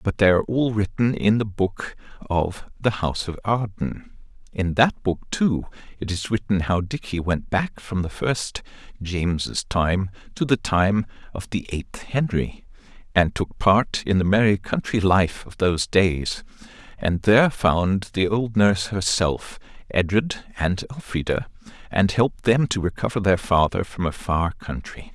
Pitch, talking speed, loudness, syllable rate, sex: 100 Hz, 160 wpm, -22 LUFS, 4.3 syllables/s, male